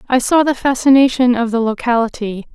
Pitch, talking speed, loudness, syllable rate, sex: 245 Hz, 165 wpm, -14 LUFS, 5.7 syllables/s, female